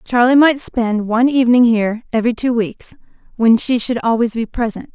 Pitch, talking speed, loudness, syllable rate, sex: 235 Hz, 180 wpm, -15 LUFS, 5.5 syllables/s, female